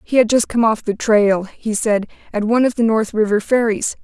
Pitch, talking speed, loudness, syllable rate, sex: 220 Hz, 240 wpm, -17 LUFS, 5.2 syllables/s, female